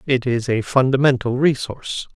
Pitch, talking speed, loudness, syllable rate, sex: 130 Hz, 135 wpm, -19 LUFS, 5.1 syllables/s, male